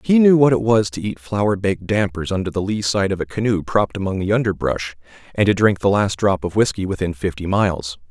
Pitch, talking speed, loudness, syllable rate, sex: 100 Hz, 235 wpm, -19 LUFS, 5.8 syllables/s, male